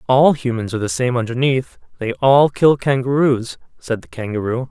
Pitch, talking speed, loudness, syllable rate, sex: 125 Hz, 165 wpm, -17 LUFS, 5.1 syllables/s, male